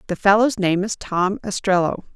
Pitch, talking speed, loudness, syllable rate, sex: 195 Hz, 165 wpm, -19 LUFS, 4.9 syllables/s, female